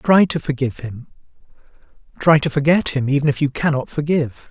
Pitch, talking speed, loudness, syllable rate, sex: 145 Hz, 175 wpm, -18 LUFS, 6.0 syllables/s, male